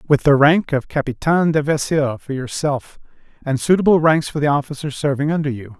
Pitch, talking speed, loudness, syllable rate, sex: 145 Hz, 185 wpm, -18 LUFS, 5.7 syllables/s, male